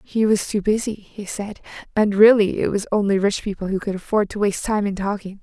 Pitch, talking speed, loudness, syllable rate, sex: 205 Hz, 230 wpm, -20 LUFS, 5.7 syllables/s, female